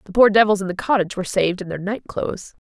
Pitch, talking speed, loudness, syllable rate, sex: 195 Hz, 270 wpm, -20 LUFS, 7.4 syllables/s, female